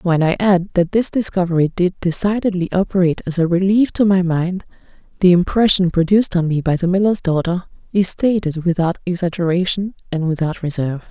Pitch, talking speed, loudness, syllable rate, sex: 180 Hz, 165 wpm, -17 LUFS, 5.8 syllables/s, female